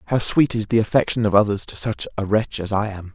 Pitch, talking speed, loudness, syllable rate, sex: 105 Hz, 265 wpm, -20 LUFS, 6.0 syllables/s, male